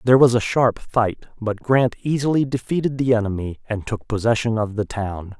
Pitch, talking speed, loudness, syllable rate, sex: 115 Hz, 190 wpm, -21 LUFS, 5.2 syllables/s, male